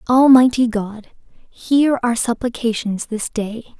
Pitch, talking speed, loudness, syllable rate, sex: 235 Hz, 110 wpm, -17 LUFS, 3.7 syllables/s, female